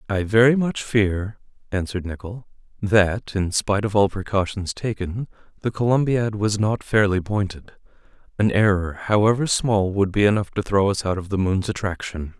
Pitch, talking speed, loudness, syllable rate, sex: 100 Hz, 165 wpm, -21 LUFS, 5.0 syllables/s, male